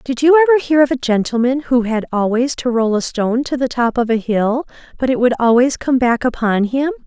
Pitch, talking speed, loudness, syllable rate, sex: 250 Hz, 240 wpm, -16 LUFS, 5.8 syllables/s, female